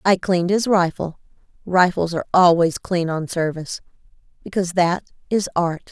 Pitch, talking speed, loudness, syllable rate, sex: 175 Hz, 120 wpm, -20 LUFS, 5.4 syllables/s, female